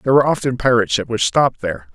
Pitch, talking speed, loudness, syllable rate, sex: 120 Hz, 245 wpm, -17 LUFS, 8.3 syllables/s, male